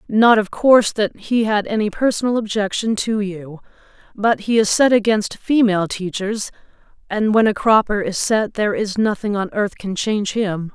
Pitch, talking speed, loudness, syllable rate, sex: 210 Hz, 180 wpm, -18 LUFS, 4.9 syllables/s, female